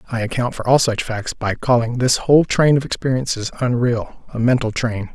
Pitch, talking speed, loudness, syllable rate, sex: 120 Hz, 200 wpm, -18 LUFS, 5.3 syllables/s, male